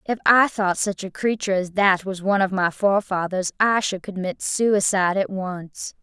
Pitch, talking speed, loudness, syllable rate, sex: 195 Hz, 190 wpm, -21 LUFS, 4.9 syllables/s, female